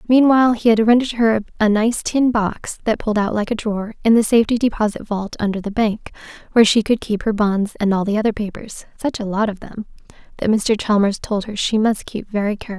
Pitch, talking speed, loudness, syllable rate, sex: 215 Hz, 220 wpm, -18 LUFS, 5.5 syllables/s, female